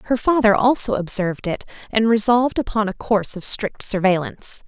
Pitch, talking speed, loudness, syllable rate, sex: 210 Hz, 165 wpm, -19 LUFS, 5.7 syllables/s, female